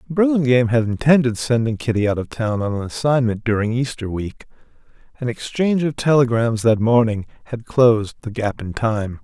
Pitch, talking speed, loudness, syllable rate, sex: 120 Hz, 170 wpm, -19 LUFS, 5.4 syllables/s, male